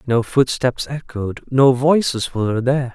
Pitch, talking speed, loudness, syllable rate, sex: 130 Hz, 145 wpm, -18 LUFS, 4.4 syllables/s, male